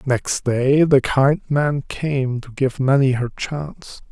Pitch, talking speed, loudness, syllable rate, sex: 135 Hz, 160 wpm, -19 LUFS, 3.4 syllables/s, male